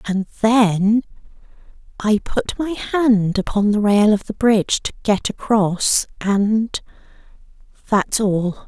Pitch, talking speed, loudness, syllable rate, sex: 210 Hz, 120 wpm, -18 LUFS, 3.4 syllables/s, female